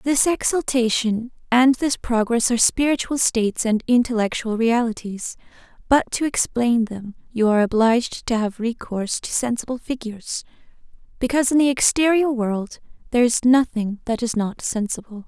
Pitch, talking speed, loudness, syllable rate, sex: 240 Hz, 140 wpm, -20 LUFS, 5.1 syllables/s, female